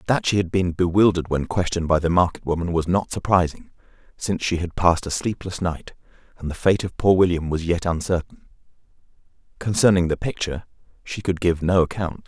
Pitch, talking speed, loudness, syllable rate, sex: 90 Hz, 185 wpm, -22 LUFS, 6.0 syllables/s, male